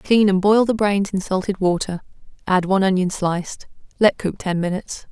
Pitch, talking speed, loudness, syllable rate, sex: 195 Hz, 190 wpm, -19 LUFS, 5.3 syllables/s, female